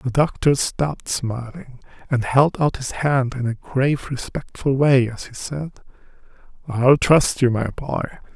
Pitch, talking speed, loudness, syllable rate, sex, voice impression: 130 Hz, 160 wpm, -20 LUFS, 4.2 syllables/s, male, very masculine, old, slightly thick, muffled, calm, friendly, slightly wild